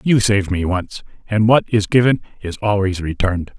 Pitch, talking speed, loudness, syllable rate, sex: 100 Hz, 185 wpm, -17 LUFS, 5.3 syllables/s, male